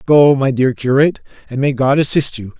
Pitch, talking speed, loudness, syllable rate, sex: 135 Hz, 210 wpm, -14 LUFS, 5.5 syllables/s, male